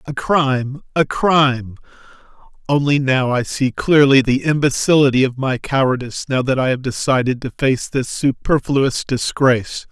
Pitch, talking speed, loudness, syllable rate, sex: 135 Hz, 145 wpm, -17 LUFS, 4.7 syllables/s, male